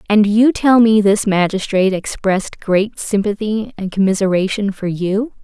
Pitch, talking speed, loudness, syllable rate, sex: 205 Hz, 145 wpm, -16 LUFS, 4.7 syllables/s, female